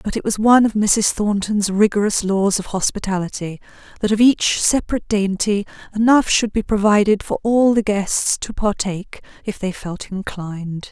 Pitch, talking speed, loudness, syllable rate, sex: 205 Hz, 165 wpm, -18 LUFS, 5.0 syllables/s, female